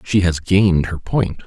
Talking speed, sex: 205 wpm, male